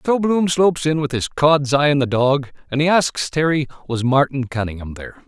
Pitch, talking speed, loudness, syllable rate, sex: 145 Hz, 215 wpm, -18 LUFS, 5.4 syllables/s, male